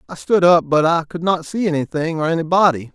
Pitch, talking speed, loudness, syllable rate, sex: 160 Hz, 225 wpm, -17 LUFS, 5.9 syllables/s, male